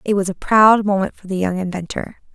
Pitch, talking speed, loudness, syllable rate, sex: 195 Hz, 230 wpm, -17 LUFS, 5.6 syllables/s, female